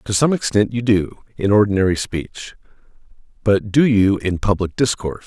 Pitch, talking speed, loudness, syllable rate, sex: 105 Hz, 160 wpm, -18 LUFS, 5.0 syllables/s, male